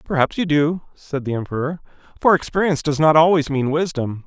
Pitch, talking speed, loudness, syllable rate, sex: 150 Hz, 185 wpm, -19 LUFS, 5.7 syllables/s, male